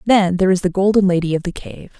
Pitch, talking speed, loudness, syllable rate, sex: 185 Hz, 270 wpm, -16 LUFS, 6.7 syllables/s, female